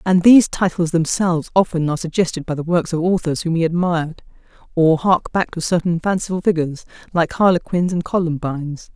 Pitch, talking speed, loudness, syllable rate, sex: 170 Hz, 175 wpm, -18 LUFS, 5.9 syllables/s, female